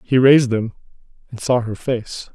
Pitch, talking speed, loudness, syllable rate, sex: 120 Hz, 180 wpm, -18 LUFS, 4.9 syllables/s, male